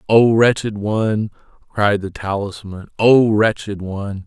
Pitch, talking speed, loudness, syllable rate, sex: 105 Hz, 125 wpm, -17 LUFS, 4.1 syllables/s, male